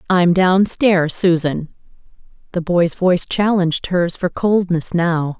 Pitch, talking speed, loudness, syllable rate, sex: 175 Hz, 120 wpm, -17 LUFS, 3.9 syllables/s, female